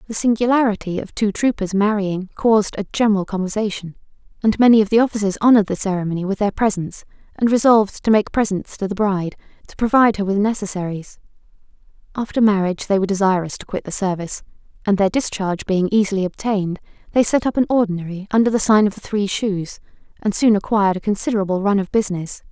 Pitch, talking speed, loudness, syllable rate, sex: 205 Hz, 185 wpm, -18 LUFS, 6.7 syllables/s, female